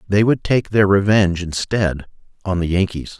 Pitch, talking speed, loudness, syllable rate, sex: 95 Hz, 170 wpm, -18 LUFS, 4.9 syllables/s, male